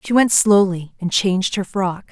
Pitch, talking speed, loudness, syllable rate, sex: 195 Hz, 200 wpm, -17 LUFS, 4.6 syllables/s, female